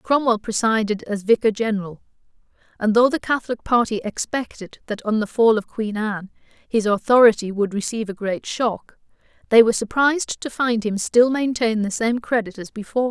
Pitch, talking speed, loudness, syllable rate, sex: 225 Hz, 175 wpm, -20 LUFS, 5.4 syllables/s, female